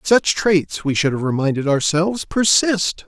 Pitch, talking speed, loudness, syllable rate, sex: 170 Hz, 155 wpm, -18 LUFS, 4.4 syllables/s, male